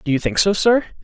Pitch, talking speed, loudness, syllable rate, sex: 190 Hz, 290 wpm, -17 LUFS, 6.7 syllables/s, male